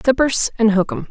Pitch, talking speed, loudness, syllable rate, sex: 235 Hz, 160 wpm, -17 LUFS, 6.1 syllables/s, female